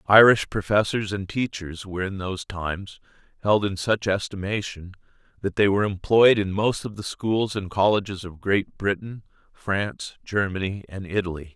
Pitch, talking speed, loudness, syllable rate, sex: 100 Hz, 155 wpm, -24 LUFS, 5.0 syllables/s, male